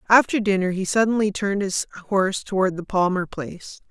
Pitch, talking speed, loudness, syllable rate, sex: 195 Hz, 170 wpm, -22 LUFS, 6.0 syllables/s, female